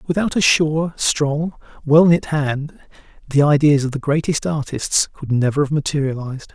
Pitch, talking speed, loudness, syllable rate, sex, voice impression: 145 Hz, 155 wpm, -18 LUFS, 4.6 syllables/s, male, masculine, middle-aged, slightly relaxed, powerful, slightly hard, raspy, intellectual, calm, mature, friendly, wild, lively, strict